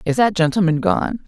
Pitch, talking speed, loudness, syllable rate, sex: 185 Hz, 190 wpm, -18 LUFS, 5.2 syllables/s, female